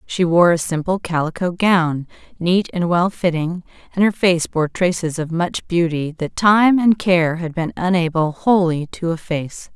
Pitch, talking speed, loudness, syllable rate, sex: 175 Hz, 170 wpm, -18 LUFS, 4.4 syllables/s, female